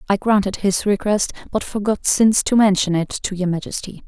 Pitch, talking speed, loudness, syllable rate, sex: 200 Hz, 190 wpm, -19 LUFS, 5.4 syllables/s, female